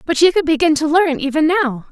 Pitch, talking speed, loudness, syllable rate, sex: 310 Hz, 250 wpm, -15 LUFS, 5.6 syllables/s, female